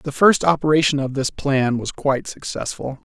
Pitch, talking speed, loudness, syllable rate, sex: 140 Hz, 175 wpm, -20 LUFS, 5.0 syllables/s, male